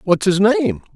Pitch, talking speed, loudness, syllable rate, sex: 175 Hz, 190 wpm, -16 LUFS, 4.1 syllables/s, male